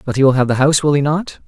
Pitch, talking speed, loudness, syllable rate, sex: 140 Hz, 365 wpm, -15 LUFS, 7.4 syllables/s, male